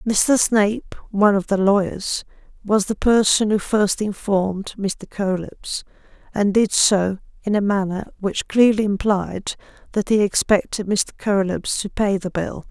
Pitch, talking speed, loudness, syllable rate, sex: 200 Hz, 150 wpm, -20 LUFS, 4.2 syllables/s, female